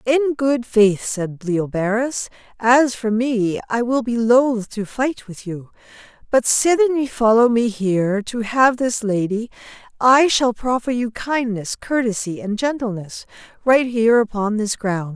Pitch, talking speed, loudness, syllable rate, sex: 230 Hz, 155 wpm, -18 LUFS, 4.1 syllables/s, female